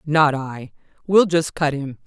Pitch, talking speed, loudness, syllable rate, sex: 150 Hz, 145 wpm, -19 LUFS, 3.8 syllables/s, female